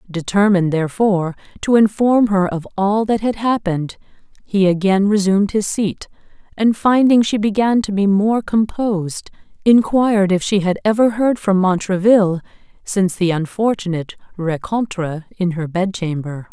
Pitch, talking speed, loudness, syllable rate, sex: 200 Hz, 140 wpm, -17 LUFS, 5.0 syllables/s, female